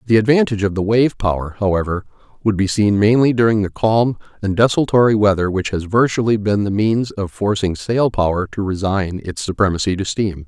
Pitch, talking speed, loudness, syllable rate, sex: 105 Hz, 190 wpm, -17 LUFS, 5.5 syllables/s, male